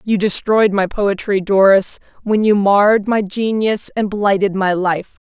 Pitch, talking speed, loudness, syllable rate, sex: 200 Hz, 160 wpm, -15 LUFS, 4.1 syllables/s, female